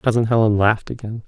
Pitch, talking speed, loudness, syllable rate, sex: 110 Hz, 190 wpm, -18 LUFS, 6.6 syllables/s, male